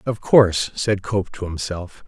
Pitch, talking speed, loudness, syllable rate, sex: 100 Hz, 175 wpm, -20 LUFS, 4.2 syllables/s, male